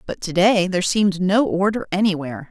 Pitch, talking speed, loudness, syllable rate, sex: 190 Hz, 190 wpm, -19 LUFS, 6.0 syllables/s, female